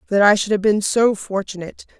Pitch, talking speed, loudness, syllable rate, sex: 205 Hz, 210 wpm, -17 LUFS, 6.0 syllables/s, female